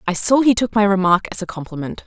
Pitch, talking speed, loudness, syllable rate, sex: 200 Hz, 260 wpm, -17 LUFS, 6.4 syllables/s, female